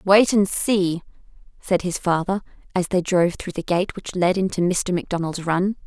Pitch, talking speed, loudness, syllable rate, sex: 180 Hz, 185 wpm, -22 LUFS, 5.0 syllables/s, female